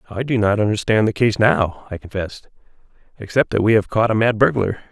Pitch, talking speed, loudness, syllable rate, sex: 105 Hz, 205 wpm, -18 LUFS, 5.9 syllables/s, male